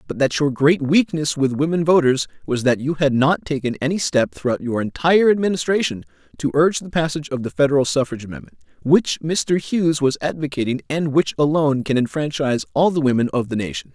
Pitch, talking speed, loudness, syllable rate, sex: 145 Hz, 195 wpm, -19 LUFS, 6.0 syllables/s, male